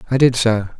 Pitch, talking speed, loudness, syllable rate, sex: 120 Hz, 225 wpm, -16 LUFS, 6.0 syllables/s, male